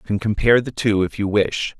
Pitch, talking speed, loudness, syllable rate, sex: 105 Hz, 270 wpm, -19 LUFS, 6.2 syllables/s, male